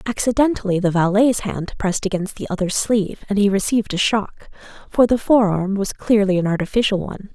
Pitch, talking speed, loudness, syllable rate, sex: 205 Hz, 180 wpm, -19 LUFS, 6.0 syllables/s, female